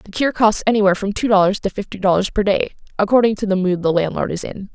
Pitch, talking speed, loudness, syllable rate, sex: 200 Hz, 255 wpm, -18 LUFS, 6.5 syllables/s, female